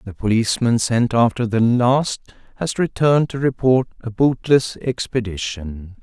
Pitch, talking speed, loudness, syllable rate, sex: 120 Hz, 130 wpm, -19 LUFS, 4.5 syllables/s, male